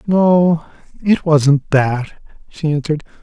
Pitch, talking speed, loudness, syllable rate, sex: 155 Hz, 95 wpm, -15 LUFS, 3.6 syllables/s, male